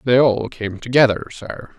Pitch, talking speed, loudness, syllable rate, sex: 120 Hz, 170 wpm, -18 LUFS, 4.9 syllables/s, male